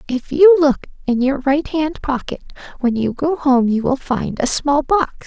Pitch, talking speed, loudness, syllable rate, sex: 280 Hz, 195 wpm, -17 LUFS, 4.5 syllables/s, female